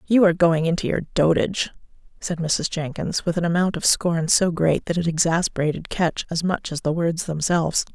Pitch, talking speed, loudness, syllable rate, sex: 170 Hz, 195 wpm, -21 LUFS, 5.3 syllables/s, female